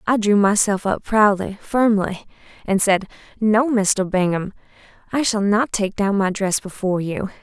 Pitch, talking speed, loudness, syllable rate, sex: 205 Hz, 160 wpm, -19 LUFS, 4.5 syllables/s, female